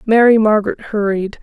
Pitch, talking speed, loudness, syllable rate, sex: 215 Hz, 125 wpm, -14 LUFS, 5.4 syllables/s, female